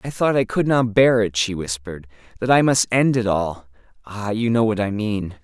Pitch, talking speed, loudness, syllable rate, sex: 110 Hz, 210 wpm, -19 LUFS, 5.0 syllables/s, male